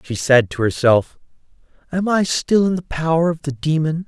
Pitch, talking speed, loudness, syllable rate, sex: 155 Hz, 190 wpm, -18 LUFS, 4.9 syllables/s, male